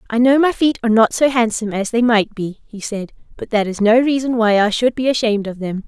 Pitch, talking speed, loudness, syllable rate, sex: 230 Hz, 265 wpm, -16 LUFS, 6.0 syllables/s, female